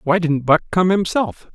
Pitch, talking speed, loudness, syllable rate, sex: 170 Hz, 195 wpm, -18 LUFS, 4.6 syllables/s, male